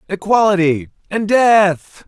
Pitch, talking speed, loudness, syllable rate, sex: 190 Hz, 85 wpm, -14 LUFS, 3.6 syllables/s, male